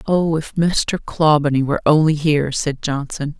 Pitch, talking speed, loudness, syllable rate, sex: 150 Hz, 160 wpm, -18 LUFS, 4.8 syllables/s, female